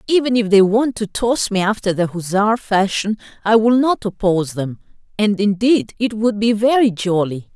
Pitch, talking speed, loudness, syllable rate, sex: 210 Hz, 185 wpm, -17 LUFS, 4.8 syllables/s, female